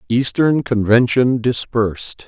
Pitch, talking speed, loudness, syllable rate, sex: 120 Hz, 80 wpm, -16 LUFS, 3.8 syllables/s, male